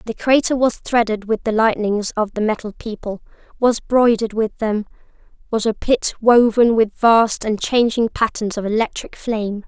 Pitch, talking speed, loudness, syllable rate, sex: 220 Hz, 170 wpm, -18 LUFS, 4.7 syllables/s, female